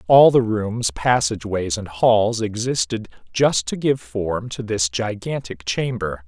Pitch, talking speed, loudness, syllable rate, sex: 110 Hz, 145 wpm, -20 LUFS, 3.9 syllables/s, male